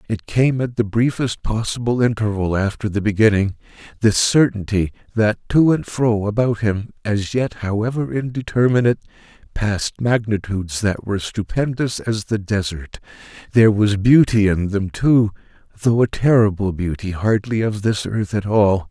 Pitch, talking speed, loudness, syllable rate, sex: 110 Hz, 145 wpm, -19 LUFS, 4.8 syllables/s, male